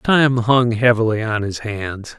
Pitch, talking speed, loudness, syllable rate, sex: 115 Hz, 165 wpm, -17 LUFS, 3.7 syllables/s, male